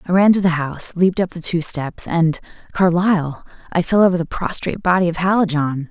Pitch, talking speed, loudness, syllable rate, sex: 175 Hz, 185 wpm, -18 LUFS, 5.8 syllables/s, female